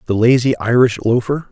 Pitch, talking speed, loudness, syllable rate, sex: 120 Hz, 160 wpm, -15 LUFS, 5.3 syllables/s, male